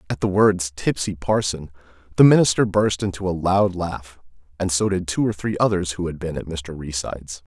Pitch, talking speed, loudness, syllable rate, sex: 90 Hz, 200 wpm, -21 LUFS, 5.2 syllables/s, male